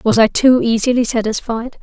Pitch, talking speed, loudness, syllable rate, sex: 235 Hz, 165 wpm, -15 LUFS, 5.2 syllables/s, female